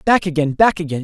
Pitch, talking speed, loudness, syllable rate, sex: 170 Hz, 230 wpm, -16 LUFS, 6.1 syllables/s, male